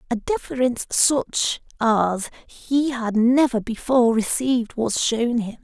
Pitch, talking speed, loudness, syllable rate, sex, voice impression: 240 Hz, 130 wpm, -21 LUFS, 4.0 syllables/s, female, feminine, slightly adult-like, weak, slightly halting, slightly friendly, reassuring, modest